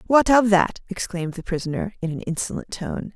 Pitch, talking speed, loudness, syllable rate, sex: 195 Hz, 190 wpm, -23 LUFS, 5.7 syllables/s, female